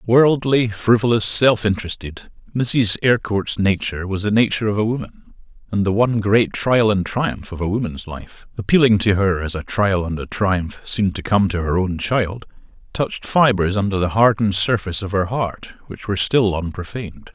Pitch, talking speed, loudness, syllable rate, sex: 100 Hz, 180 wpm, -19 LUFS, 5.1 syllables/s, male